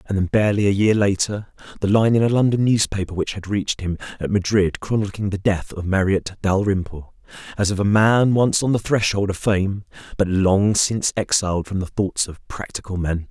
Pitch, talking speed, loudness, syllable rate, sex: 100 Hz, 200 wpm, -20 LUFS, 5.3 syllables/s, male